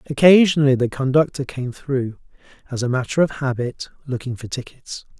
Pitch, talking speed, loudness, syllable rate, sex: 135 Hz, 150 wpm, -20 LUFS, 5.5 syllables/s, male